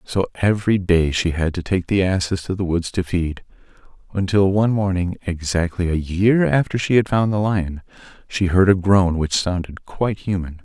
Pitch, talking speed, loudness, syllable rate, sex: 90 Hz, 190 wpm, -19 LUFS, 5.0 syllables/s, male